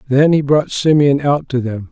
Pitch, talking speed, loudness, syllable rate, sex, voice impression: 140 Hz, 220 wpm, -14 LUFS, 4.7 syllables/s, male, masculine, slightly middle-aged, slightly soft, slightly muffled, calm, elegant, slightly wild